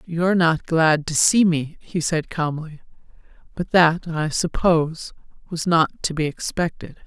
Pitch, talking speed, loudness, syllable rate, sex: 165 Hz, 160 wpm, -20 LUFS, 4.4 syllables/s, female